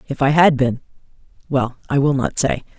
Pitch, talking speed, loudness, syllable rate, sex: 130 Hz, 175 wpm, -18 LUFS, 5.2 syllables/s, female